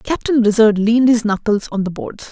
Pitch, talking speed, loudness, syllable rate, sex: 225 Hz, 210 wpm, -15 LUFS, 5.3 syllables/s, female